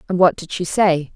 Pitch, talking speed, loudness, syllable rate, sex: 175 Hz, 260 wpm, -18 LUFS, 5.2 syllables/s, female